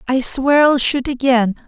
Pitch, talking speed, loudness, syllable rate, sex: 260 Hz, 180 wpm, -15 LUFS, 4.2 syllables/s, female